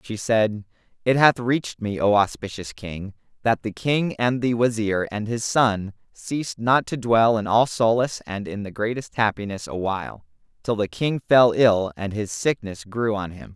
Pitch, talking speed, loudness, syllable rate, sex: 110 Hz, 185 wpm, -22 LUFS, 4.5 syllables/s, male